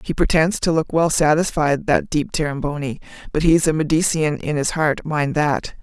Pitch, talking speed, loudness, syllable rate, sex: 155 Hz, 165 wpm, -19 LUFS, 4.8 syllables/s, female